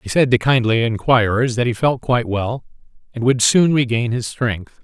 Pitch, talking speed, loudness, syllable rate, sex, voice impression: 120 Hz, 200 wpm, -17 LUFS, 4.9 syllables/s, male, very masculine, very adult-like, slightly old, very thick, slightly tensed, very powerful, slightly bright, soft, clear, fluent, slightly raspy, very cool, intellectual, slightly refreshing, sincere, very calm, very friendly, very reassuring, unique, elegant, slightly wild, sweet, lively, kind, slightly modest